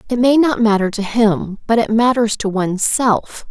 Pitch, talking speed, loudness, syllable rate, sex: 220 Hz, 205 wpm, -16 LUFS, 4.7 syllables/s, female